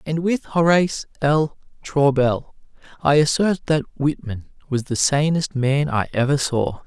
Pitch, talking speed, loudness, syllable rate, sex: 145 Hz, 140 wpm, -20 LUFS, 4.2 syllables/s, male